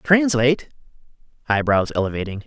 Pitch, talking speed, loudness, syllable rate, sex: 130 Hz, 75 wpm, -20 LUFS, 3.7 syllables/s, male